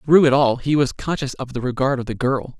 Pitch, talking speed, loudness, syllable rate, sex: 135 Hz, 280 wpm, -20 LUFS, 5.6 syllables/s, male